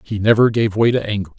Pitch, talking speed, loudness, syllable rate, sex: 110 Hz, 260 wpm, -16 LUFS, 6.5 syllables/s, male